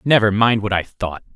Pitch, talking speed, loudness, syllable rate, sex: 105 Hz, 220 wpm, -18 LUFS, 5.2 syllables/s, male